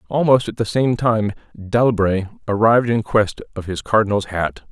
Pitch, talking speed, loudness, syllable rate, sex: 110 Hz, 165 wpm, -18 LUFS, 4.9 syllables/s, male